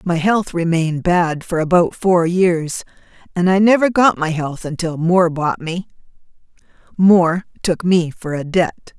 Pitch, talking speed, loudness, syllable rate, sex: 175 Hz, 160 wpm, -16 LUFS, 4.4 syllables/s, female